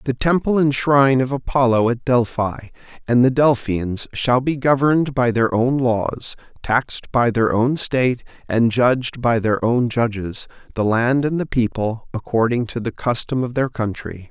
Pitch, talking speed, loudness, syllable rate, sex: 120 Hz, 170 wpm, -19 LUFS, 4.5 syllables/s, male